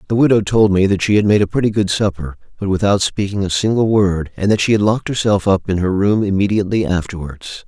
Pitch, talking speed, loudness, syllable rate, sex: 100 Hz, 235 wpm, -16 LUFS, 6.3 syllables/s, male